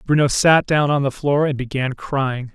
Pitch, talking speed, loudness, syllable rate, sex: 140 Hz, 210 wpm, -18 LUFS, 4.5 syllables/s, male